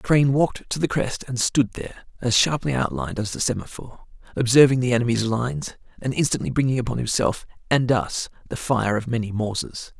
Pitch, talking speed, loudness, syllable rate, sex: 125 Hz, 180 wpm, -22 LUFS, 6.0 syllables/s, male